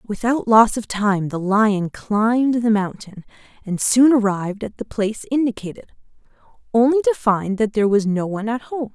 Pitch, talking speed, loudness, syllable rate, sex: 220 Hz, 175 wpm, -19 LUFS, 5.1 syllables/s, female